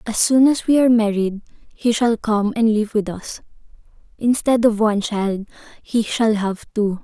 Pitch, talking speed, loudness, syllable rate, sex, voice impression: 220 Hz, 180 wpm, -18 LUFS, 4.4 syllables/s, female, feminine, young, relaxed, soft, slightly halting, cute, friendly, reassuring, sweet, kind, modest